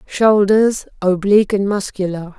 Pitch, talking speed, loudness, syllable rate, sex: 200 Hz, 75 wpm, -16 LUFS, 4.3 syllables/s, female